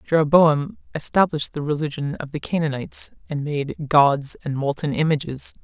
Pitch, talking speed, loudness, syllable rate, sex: 150 Hz, 140 wpm, -21 LUFS, 5.2 syllables/s, female